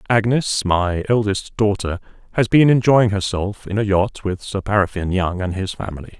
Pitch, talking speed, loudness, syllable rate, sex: 100 Hz, 175 wpm, -19 LUFS, 5.0 syllables/s, male